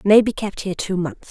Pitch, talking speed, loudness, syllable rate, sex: 195 Hz, 275 wpm, -20 LUFS, 5.6 syllables/s, female